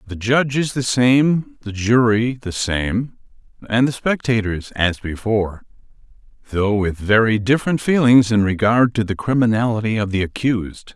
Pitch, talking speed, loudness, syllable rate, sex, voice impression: 115 Hz, 150 wpm, -18 LUFS, 4.8 syllables/s, male, masculine, very adult-like, slightly thick, sincere, slightly friendly, slightly kind